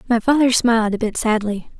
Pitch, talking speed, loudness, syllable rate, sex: 230 Hz, 200 wpm, -18 LUFS, 5.8 syllables/s, female